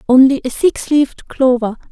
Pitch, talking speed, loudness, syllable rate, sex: 265 Hz, 155 wpm, -14 LUFS, 5.0 syllables/s, female